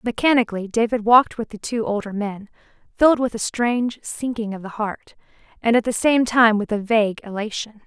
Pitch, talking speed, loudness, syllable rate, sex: 225 Hz, 190 wpm, -20 LUFS, 5.6 syllables/s, female